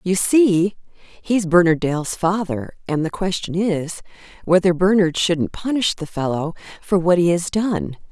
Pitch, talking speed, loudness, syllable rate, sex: 180 Hz, 155 wpm, -19 LUFS, 4.2 syllables/s, female